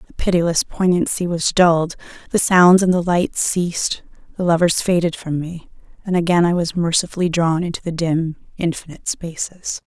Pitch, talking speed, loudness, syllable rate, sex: 170 Hz, 165 wpm, -18 LUFS, 5.2 syllables/s, female